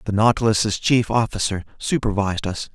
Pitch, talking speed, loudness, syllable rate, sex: 105 Hz, 130 wpm, -21 LUFS, 5.3 syllables/s, male